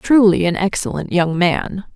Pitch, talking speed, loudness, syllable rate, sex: 190 Hz, 155 wpm, -16 LUFS, 4.3 syllables/s, female